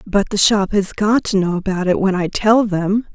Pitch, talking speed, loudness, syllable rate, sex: 200 Hz, 250 wpm, -16 LUFS, 4.7 syllables/s, female